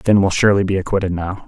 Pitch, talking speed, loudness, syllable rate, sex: 95 Hz, 245 wpm, -17 LUFS, 7.0 syllables/s, male